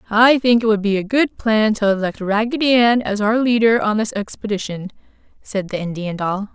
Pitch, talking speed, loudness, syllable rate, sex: 215 Hz, 200 wpm, -17 LUFS, 5.2 syllables/s, female